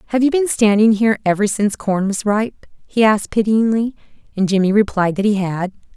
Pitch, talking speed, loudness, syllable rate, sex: 210 Hz, 190 wpm, -17 LUFS, 5.8 syllables/s, female